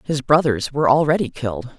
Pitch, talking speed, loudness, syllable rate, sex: 145 Hz, 170 wpm, -18 LUFS, 6.0 syllables/s, female